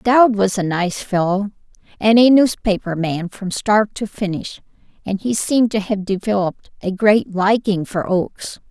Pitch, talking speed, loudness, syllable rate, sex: 205 Hz, 165 wpm, -18 LUFS, 4.5 syllables/s, female